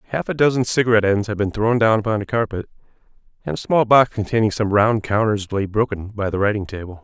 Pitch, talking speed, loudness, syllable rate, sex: 105 Hz, 220 wpm, -19 LUFS, 6.4 syllables/s, male